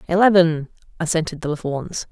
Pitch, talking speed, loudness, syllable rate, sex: 165 Hz, 140 wpm, -20 LUFS, 6.3 syllables/s, female